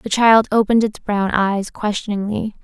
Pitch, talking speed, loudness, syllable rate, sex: 210 Hz, 160 wpm, -17 LUFS, 4.8 syllables/s, female